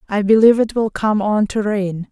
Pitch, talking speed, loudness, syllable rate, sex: 210 Hz, 225 wpm, -16 LUFS, 5.2 syllables/s, female